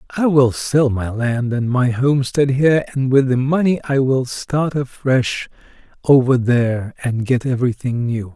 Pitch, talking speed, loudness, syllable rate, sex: 130 Hz, 165 wpm, -17 LUFS, 4.6 syllables/s, male